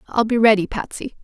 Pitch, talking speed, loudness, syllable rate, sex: 225 Hz, 195 wpm, -18 LUFS, 5.8 syllables/s, female